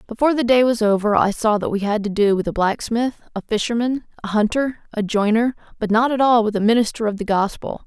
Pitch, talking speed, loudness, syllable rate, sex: 220 Hz, 235 wpm, -19 LUFS, 6.0 syllables/s, female